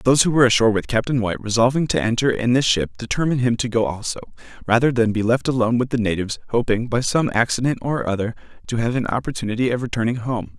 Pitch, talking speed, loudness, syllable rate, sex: 120 Hz, 220 wpm, -20 LUFS, 7.0 syllables/s, male